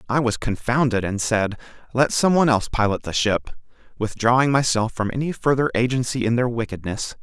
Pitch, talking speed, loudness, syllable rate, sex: 120 Hz, 175 wpm, -21 LUFS, 5.6 syllables/s, male